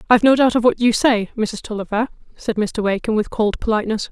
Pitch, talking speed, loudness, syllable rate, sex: 225 Hz, 220 wpm, -18 LUFS, 6.2 syllables/s, female